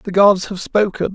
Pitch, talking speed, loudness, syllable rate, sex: 195 Hz, 210 wpm, -16 LUFS, 4.5 syllables/s, male